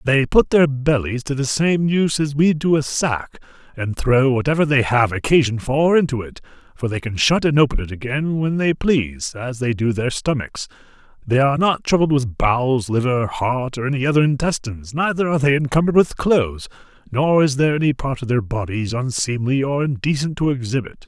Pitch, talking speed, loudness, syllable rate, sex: 135 Hz, 195 wpm, -19 LUFS, 5.4 syllables/s, male